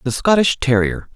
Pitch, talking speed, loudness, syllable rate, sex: 145 Hz, 155 wpm, -16 LUFS, 4.9 syllables/s, male